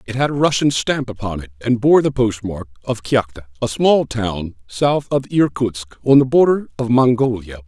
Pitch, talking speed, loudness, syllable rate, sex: 120 Hz, 190 wpm, -17 LUFS, 4.7 syllables/s, male